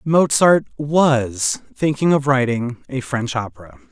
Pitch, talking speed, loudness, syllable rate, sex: 135 Hz, 125 wpm, -18 LUFS, 4.1 syllables/s, male